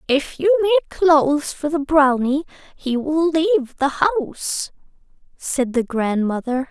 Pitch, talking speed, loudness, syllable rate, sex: 295 Hz, 135 wpm, -19 LUFS, 4.1 syllables/s, female